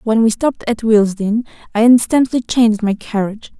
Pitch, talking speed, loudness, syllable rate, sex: 225 Hz, 165 wpm, -15 LUFS, 5.8 syllables/s, female